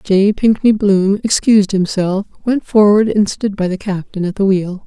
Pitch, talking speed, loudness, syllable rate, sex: 200 Hz, 185 wpm, -14 LUFS, 4.6 syllables/s, female